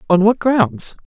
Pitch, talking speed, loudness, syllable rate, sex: 200 Hz, 170 wpm, -15 LUFS, 3.8 syllables/s, female